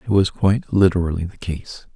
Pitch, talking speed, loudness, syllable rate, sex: 90 Hz, 185 wpm, -20 LUFS, 5.4 syllables/s, male